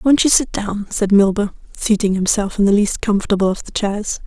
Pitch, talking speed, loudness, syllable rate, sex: 205 Hz, 210 wpm, -17 LUFS, 5.3 syllables/s, female